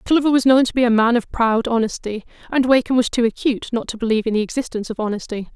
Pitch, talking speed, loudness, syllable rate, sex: 235 Hz, 250 wpm, -19 LUFS, 7.3 syllables/s, female